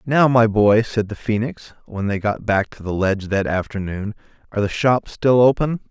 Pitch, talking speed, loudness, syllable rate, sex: 110 Hz, 205 wpm, -19 LUFS, 5.0 syllables/s, male